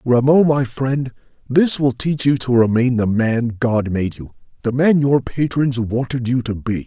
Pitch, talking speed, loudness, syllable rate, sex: 125 Hz, 190 wpm, -17 LUFS, 4.2 syllables/s, male